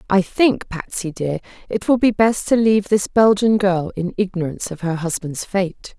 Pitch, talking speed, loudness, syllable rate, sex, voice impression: 190 Hz, 190 wpm, -19 LUFS, 4.8 syllables/s, female, feminine, adult-like, slightly fluent, sincere, slightly calm, slightly reassuring, slightly kind